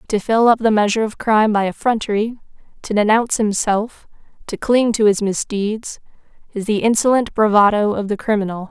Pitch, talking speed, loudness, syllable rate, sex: 215 Hz, 165 wpm, -17 LUFS, 5.5 syllables/s, female